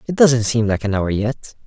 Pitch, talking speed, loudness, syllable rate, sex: 115 Hz, 250 wpm, -18 LUFS, 4.9 syllables/s, male